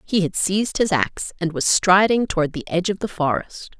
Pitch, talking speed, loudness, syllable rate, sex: 180 Hz, 220 wpm, -20 LUFS, 5.6 syllables/s, female